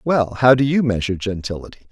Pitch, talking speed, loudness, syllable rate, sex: 115 Hz, 190 wpm, -18 LUFS, 6.2 syllables/s, male